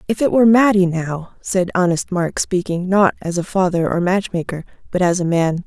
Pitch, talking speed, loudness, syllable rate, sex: 185 Hz, 210 wpm, -17 LUFS, 5.1 syllables/s, female